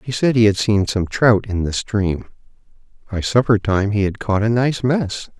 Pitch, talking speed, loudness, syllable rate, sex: 110 Hz, 210 wpm, -18 LUFS, 4.6 syllables/s, male